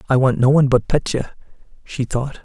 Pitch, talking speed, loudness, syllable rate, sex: 130 Hz, 195 wpm, -18 LUFS, 5.7 syllables/s, male